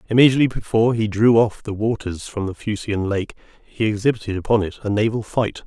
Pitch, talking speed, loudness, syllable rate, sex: 105 Hz, 190 wpm, -20 LUFS, 6.3 syllables/s, male